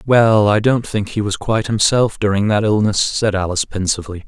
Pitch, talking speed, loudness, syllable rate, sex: 105 Hz, 195 wpm, -16 LUFS, 5.6 syllables/s, male